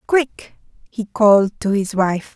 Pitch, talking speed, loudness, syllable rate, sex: 215 Hz, 155 wpm, -17 LUFS, 3.7 syllables/s, female